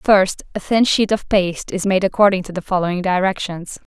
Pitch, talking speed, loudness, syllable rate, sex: 190 Hz, 195 wpm, -18 LUFS, 5.4 syllables/s, female